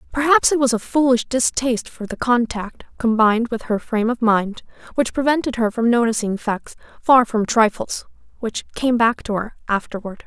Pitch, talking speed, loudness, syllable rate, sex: 235 Hz, 175 wpm, -19 LUFS, 5.1 syllables/s, female